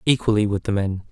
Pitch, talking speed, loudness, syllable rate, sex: 105 Hz, 215 wpm, -21 LUFS, 6.3 syllables/s, male